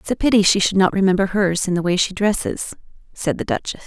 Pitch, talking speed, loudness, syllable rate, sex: 190 Hz, 250 wpm, -18 LUFS, 6.1 syllables/s, female